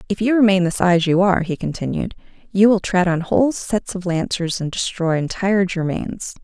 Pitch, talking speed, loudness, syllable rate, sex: 190 Hz, 195 wpm, -19 LUFS, 5.3 syllables/s, female